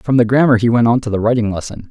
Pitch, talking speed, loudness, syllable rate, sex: 115 Hz, 315 wpm, -14 LUFS, 7.0 syllables/s, male